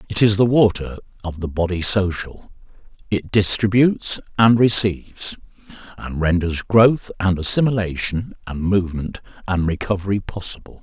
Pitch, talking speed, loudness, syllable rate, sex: 95 Hz, 120 wpm, -19 LUFS, 4.9 syllables/s, male